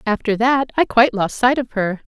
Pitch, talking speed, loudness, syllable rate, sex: 235 Hz, 230 wpm, -17 LUFS, 5.3 syllables/s, female